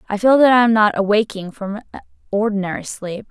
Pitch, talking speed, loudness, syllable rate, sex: 210 Hz, 180 wpm, -17 LUFS, 5.8 syllables/s, female